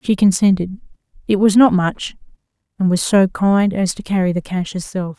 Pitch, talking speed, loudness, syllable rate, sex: 190 Hz, 160 wpm, -16 LUFS, 5.0 syllables/s, female